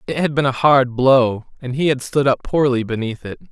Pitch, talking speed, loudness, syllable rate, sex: 130 Hz, 240 wpm, -17 LUFS, 5.1 syllables/s, male